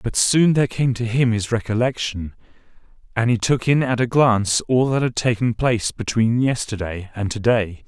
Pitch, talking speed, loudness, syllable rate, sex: 115 Hz, 190 wpm, -20 LUFS, 5.0 syllables/s, male